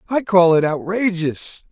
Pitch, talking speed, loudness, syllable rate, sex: 180 Hz, 140 wpm, -17 LUFS, 4.1 syllables/s, male